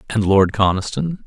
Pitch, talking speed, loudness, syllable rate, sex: 110 Hz, 140 wpm, -17 LUFS, 4.9 syllables/s, male